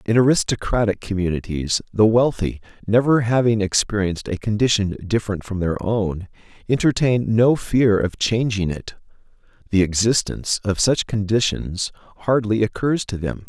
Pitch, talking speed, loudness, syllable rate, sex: 105 Hz, 130 wpm, -20 LUFS, 4.9 syllables/s, male